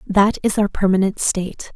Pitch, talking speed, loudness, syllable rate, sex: 195 Hz, 170 wpm, -18 LUFS, 5.1 syllables/s, female